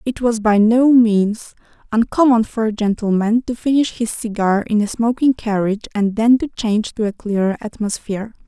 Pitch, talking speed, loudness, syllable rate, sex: 220 Hz, 175 wpm, -17 LUFS, 5.0 syllables/s, female